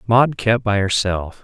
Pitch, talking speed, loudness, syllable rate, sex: 105 Hz, 170 wpm, -18 LUFS, 3.9 syllables/s, male